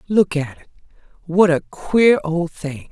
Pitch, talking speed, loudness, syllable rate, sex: 170 Hz, 165 wpm, -18 LUFS, 3.9 syllables/s, female